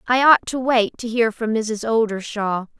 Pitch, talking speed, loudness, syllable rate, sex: 225 Hz, 195 wpm, -19 LUFS, 4.5 syllables/s, female